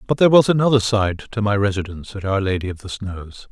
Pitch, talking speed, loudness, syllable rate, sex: 105 Hz, 240 wpm, -19 LUFS, 6.5 syllables/s, male